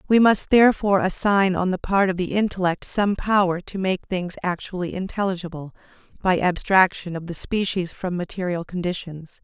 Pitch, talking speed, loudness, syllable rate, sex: 185 Hz, 160 wpm, -22 LUFS, 5.2 syllables/s, female